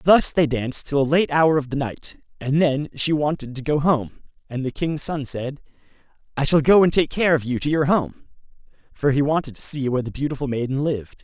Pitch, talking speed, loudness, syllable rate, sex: 140 Hz, 230 wpm, -21 LUFS, 5.6 syllables/s, male